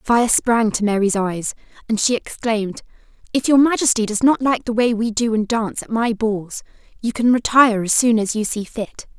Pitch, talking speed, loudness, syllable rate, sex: 225 Hz, 210 wpm, -18 LUFS, 5.1 syllables/s, female